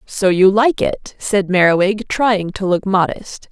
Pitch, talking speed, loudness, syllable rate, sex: 195 Hz, 170 wpm, -15 LUFS, 3.9 syllables/s, female